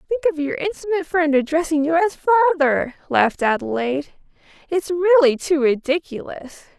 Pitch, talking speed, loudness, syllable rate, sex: 320 Hz, 135 wpm, -19 LUFS, 7.8 syllables/s, female